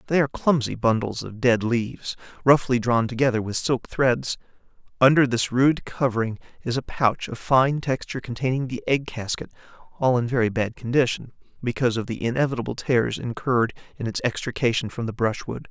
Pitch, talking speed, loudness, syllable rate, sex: 125 Hz, 170 wpm, -23 LUFS, 5.6 syllables/s, male